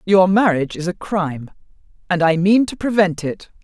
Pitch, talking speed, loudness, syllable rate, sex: 185 Hz, 165 wpm, -18 LUFS, 5.3 syllables/s, female